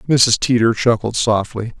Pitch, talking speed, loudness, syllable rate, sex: 115 Hz, 135 wpm, -16 LUFS, 4.6 syllables/s, male